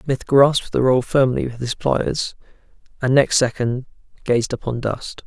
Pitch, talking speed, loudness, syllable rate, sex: 130 Hz, 160 wpm, -19 LUFS, 4.4 syllables/s, male